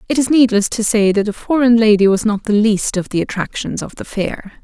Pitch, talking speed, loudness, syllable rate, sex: 215 Hz, 245 wpm, -15 LUFS, 5.5 syllables/s, female